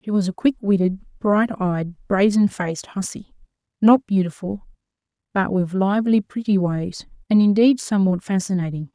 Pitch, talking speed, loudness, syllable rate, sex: 195 Hz, 140 wpm, -20 LUFS, 4.9 syllables/s, female